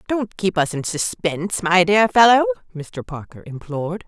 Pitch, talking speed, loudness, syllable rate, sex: 175 Hz, 160 wpm, -18 LUFS, 4.7 syllables/s, female